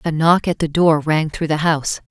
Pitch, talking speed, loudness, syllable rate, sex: 160 Hz, 255 wpm, -17 LUFS, 5.1 syllables/s, female